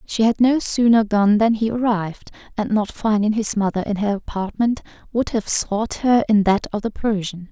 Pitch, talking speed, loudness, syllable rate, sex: 215 Hz, 200 wpm, -19 LUFS, 4.9 syllables/s, female